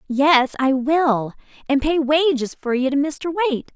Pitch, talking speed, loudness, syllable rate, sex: 285 Hz, 175 wpm, -19 LUFS, 4.4 syllables/s, female